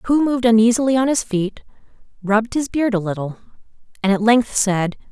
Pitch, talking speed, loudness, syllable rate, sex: 225 Hz, 175 wpm, -18 LUFS, 5.8 syllables/s, female